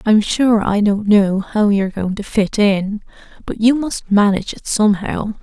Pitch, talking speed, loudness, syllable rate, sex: 210 Hz, 190 wpm, -16 LUFS, 4.6 syllables/s, female